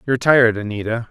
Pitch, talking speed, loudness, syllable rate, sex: 115 Hz, 165 wpm, -17 LUFS, 7.2 syllables/s, male